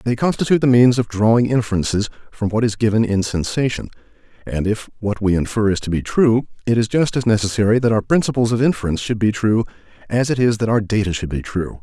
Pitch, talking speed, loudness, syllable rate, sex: 110 Hz, 225 wpm, -18 LUFS, 6.3 syllables/s, male